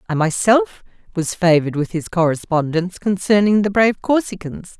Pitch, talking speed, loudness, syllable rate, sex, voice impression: 185 Hz, 140 wpm, -17 LUFS, 5.4 syllables/s, female, feminine, very adult-like, slightly cool, intellectual, calm, slightly strict